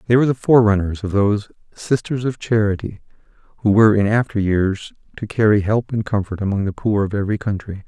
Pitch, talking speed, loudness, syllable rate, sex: 105 Hz, 190 wpm, -18 LUFS, 6.3 syllables/s, male